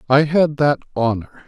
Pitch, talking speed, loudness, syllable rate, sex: 140 Hz, 160 wpm, -18 LUFS, 5.0 syllables/s, male